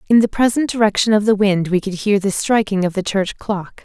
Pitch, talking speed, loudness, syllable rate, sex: 205 Hz, 250 wpm, -17 LUFS, 5.5 syllables/s, female